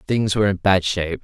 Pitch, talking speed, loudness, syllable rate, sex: 95 Hz, 245 wpm, -19 LUFS, 6.5 syllables/s, male